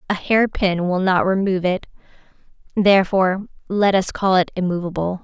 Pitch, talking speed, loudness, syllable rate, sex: 185 Hz, 140 wpm, -19 LUFS, 5.4 syllables/s, female